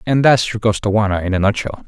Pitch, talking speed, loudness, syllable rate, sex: 105 Hz, 225 wpm, -16 LUFS, 6.3 syllables/s, male